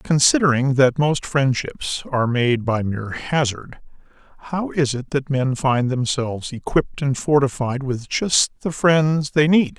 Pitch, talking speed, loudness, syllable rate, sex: 135 Hz, 155 wpm, -20 LUFS, 4.3 syllables/s, male